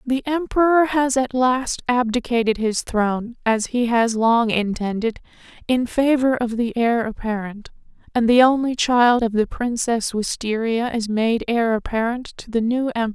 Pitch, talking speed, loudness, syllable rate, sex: 235 Hz, 160 wpm, -20 LUFS, 4.5 syllables/s, female